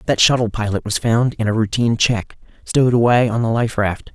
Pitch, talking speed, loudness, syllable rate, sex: 115 Hz, 215 wpm, -17 LUFS, 5.7 syllables/s, male